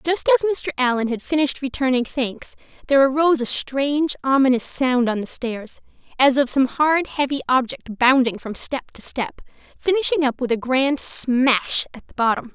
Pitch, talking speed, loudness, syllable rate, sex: 265 Hz, 175 wpm, -20 LUFS, 5.0 syllables/s, female